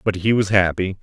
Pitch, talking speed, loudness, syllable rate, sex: 95 Hz, 235 wpm, -18 LUFS, 5.6 syllables/s, male